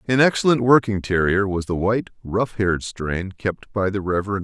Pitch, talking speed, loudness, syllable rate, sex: 100 Hz, 190 wpm, -21 LUFS, 5.0 syllables/s, male